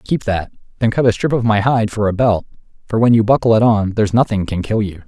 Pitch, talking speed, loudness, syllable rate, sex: 110 Hz, 270 wpm, -16 LUFS, 6.1 syllables/s, male